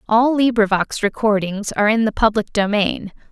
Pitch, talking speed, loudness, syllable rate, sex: 215 Hz, 145 wpm, -18 LUFS, 5.2 syllables/s, female